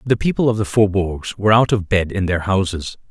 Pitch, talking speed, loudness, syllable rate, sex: 100 Hz, 230 wpm, -18 LUFS, 5.5 syllables/s, male